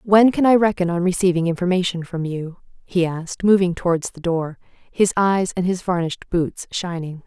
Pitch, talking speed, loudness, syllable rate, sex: 180 Hz, 180 wpm, -20 LUFS, 5.0 syllables/s, female